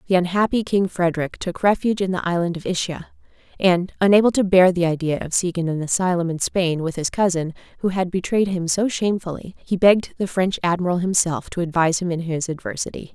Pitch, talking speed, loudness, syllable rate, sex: 180 Hz, 200 wpm, -20 LUFS, 6.0 syllables/s, female